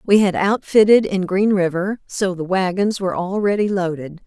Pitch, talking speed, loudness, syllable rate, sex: 190 Hz, 170 wpm, -18 LUFS, 4.9 syllables/s, female